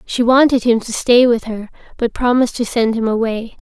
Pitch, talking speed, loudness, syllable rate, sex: 235 Hz, 215 wpm, -15 LUFS, 5.3 syllables/s, female